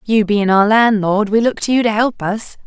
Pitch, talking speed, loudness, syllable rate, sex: 215 Hz, 250 wpm, -15 LUFS, 4.8 syllables/s, female